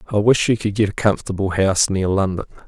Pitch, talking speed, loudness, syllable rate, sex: 100 Hz, 225 wpm, -18 LUFS, 6.7 syllables/s, male